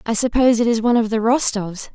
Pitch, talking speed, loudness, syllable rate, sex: 225 Hz, 245 wpm, -17 LUFS, 6.7 syllables/s, female